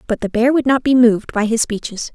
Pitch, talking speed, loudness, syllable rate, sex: 235 Hz, 280 wpm, -16 LUFS, 6.0 syllables/s, female